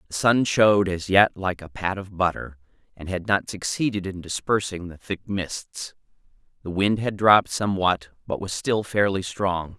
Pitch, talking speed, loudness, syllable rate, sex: 95 Hz, 180 wpm, -23 LUFS, 4.6 syllables/s, male